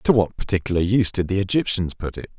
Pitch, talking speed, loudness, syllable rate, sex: 95 Hz, 225 wpm, -22 LUFS, 6.7 syllables/s, male